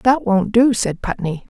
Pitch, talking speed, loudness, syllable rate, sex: 215 Hz, 190 wpm, -17 LUFS, 4.1 syllables/s, female